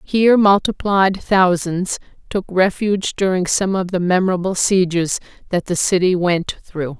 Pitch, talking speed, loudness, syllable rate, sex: 185 Hz, 135 wpm, -17 LUFS, 4.5 syllables/s, female